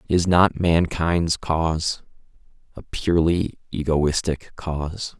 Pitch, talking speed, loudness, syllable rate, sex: 85 Hz, 80 wpm, -22 LUFS, 3.6 syllables/s, male